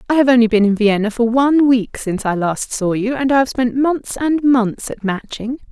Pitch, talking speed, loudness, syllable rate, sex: 240 Hz, 240 wpm, -16 LUFS, 5.2 syllables/s, female